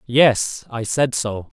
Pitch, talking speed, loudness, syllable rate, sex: 115 Hz, 150 wpm, -19 LUFS, 3.0 syllables/s, male